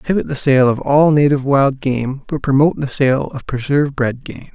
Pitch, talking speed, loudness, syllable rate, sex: 135 Hz, 210 wpm, -15 LUFS, 5.5 syllables/s, male